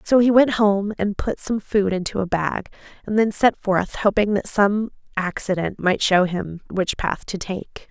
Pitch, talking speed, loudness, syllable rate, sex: 200 Hz, 195 wpm, -21 LUFS, 4.2 syllables/s, female